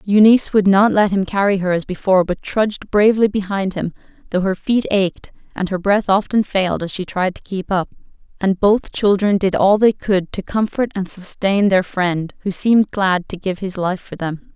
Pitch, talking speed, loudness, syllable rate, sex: 195 Hz, 210 wpm, -17 LUFS, 5.0 syllables/s, female